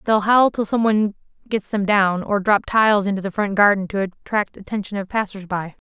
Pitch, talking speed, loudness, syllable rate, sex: 200 Hz, 205 wpm, -20 LUFS, 5.9 syllables/s, female